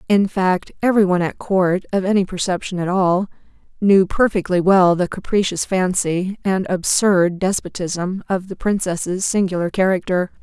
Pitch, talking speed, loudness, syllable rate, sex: 185 Hz, 145 wpm, -18 LUFS, 4.7 syllables/s, female